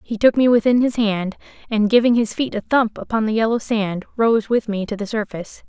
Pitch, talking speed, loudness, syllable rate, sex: 220 Hz, 230 wpm, -19 LUFS, 5.4 syllables/s, female